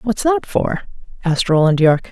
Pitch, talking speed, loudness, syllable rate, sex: 195 Hz, 170 wpm, -17 LUFS, 5.5 syllables/s, female